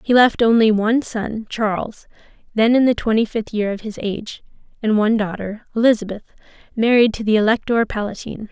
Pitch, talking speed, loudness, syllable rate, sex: 220 Hz, 170 wpm, -18 LUFS, 5.8 syllables/s, female